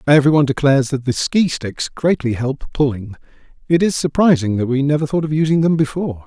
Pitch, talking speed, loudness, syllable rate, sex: 145 Hz, 190 wpm, -17 LUFS, 5.9 syllables/s, male